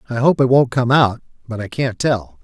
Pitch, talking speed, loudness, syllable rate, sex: 125 Hz, 245 wpm, -16 LUFS, 5.1 syllables/s, male